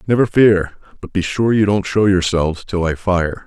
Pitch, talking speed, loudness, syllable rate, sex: 95 Hz, 210 wpm, -16 LUFS, 4.9 syllables/s, male